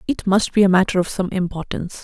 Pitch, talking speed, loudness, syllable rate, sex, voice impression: 190 Hz, 235 wpm, -19 LUFS, 6.4 syllables/s, female, feminine, slightly adult-like, slightly soft, fluent, slightly friendly, slightly reassuring, kind